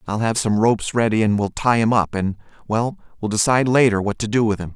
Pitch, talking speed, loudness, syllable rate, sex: 110 Hz, 240 wpm, -19 LUFS, 6.1 syllables/s, male